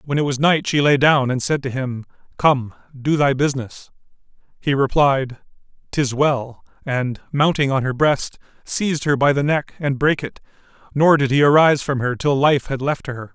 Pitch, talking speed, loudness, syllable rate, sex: 140 Hz, 195 wpm, -18 LUFS, 4.9 syllables/s, male